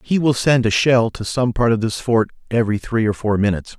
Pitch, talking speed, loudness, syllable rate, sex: 115 Hz, 255 wpm, -18 LUFS, 5.7 syllables/s, male